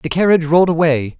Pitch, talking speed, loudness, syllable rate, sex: 160 Hz, 200 wpm, -14 LUFS, 7.0 syllables/s, male